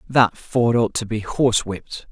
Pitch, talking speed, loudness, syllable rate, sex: 115 Hz, 170 wpm, -20 LUFS, 4.6 syllables/s, male